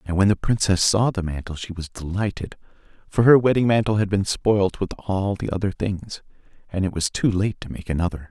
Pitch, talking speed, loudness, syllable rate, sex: 95 Hz, 215 wpm, -22 LUFS, 5.4 syllables/s, male